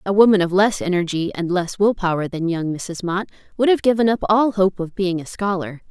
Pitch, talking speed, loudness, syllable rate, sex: 190 Hz, 235 wpm, -19 LUFS, 5.4 syllables/s, female